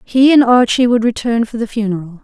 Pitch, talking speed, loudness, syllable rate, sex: 230 Hz, 215 wpm, -13 LUFS, 5.6 syllables/s, female